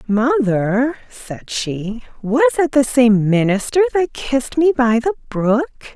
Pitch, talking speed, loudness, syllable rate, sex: 250 Hz, 140 wpm, -17 LUFS, 4.2 syllables/s, female